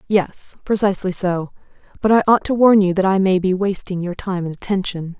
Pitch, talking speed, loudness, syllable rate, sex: 190 Hz, 210 wpm, -18 LUFS, 5.4 syllables/s, female